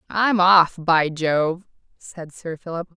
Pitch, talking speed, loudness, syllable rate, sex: 170 Hz, 140 wpm, -19 LUFS, 3.3 syllables/s, female